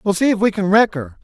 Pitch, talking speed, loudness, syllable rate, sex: 195 Hz, 340 wpm, -16 LUFS, 6.3 syllables/s, male